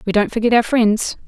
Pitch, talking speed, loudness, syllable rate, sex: 220 Hz, 235 wpm, -16 LUFS, 5.6 syllables/s, female